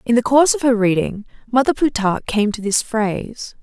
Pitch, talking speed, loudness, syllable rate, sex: 230 Hz, 200 wpm, -17 LUFS, 5.7 syllables/s, female